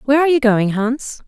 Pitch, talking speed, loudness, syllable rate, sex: 250 Hz, 235 wpm, -16 LUFS, 6.1 syllables/s, female